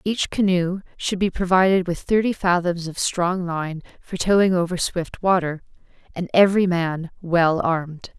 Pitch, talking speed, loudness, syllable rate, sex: 180 Hz, 155 wpm, -21 LUFS, 4.5 syllables/s, female